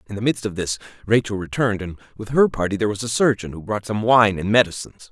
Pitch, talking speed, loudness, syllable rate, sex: 105 Hz, 245 wpm, -20 LUFS, 6.7 syllables/s, male